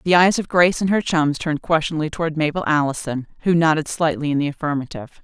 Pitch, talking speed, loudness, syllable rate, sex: 155 Hz, 205 wpm, -19 LUFS, 6.7 syllables/s, female